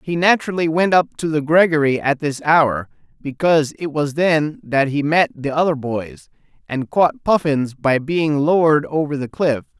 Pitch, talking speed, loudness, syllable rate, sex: 155 Hz, 180 wpm, -18 LUFS, 4.7 syllables/s, male